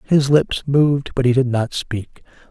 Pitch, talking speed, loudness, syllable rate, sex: 130 Hz, 190 wpm, -18 LUFS, 4.3 syllables/s, male